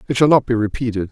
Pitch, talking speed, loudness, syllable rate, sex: 120 Hz, 270 wpm, -17 LUFS, 7.5 syllables/s, male